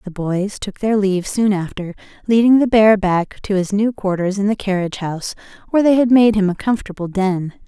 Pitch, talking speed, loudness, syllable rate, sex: 200 Hz, 210 wpm, -17 LUFS, 5.6 syllables/s, female